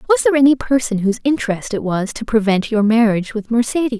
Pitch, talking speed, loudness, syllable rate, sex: 225 Hz, 210 wpm, -17 LUFS, 6.6 syllables/s, female